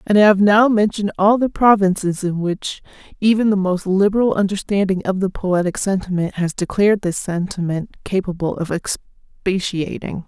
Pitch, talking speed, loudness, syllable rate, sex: 195 Hz, 150 wpm, -18 LUFS, 5.0 syllables/s, female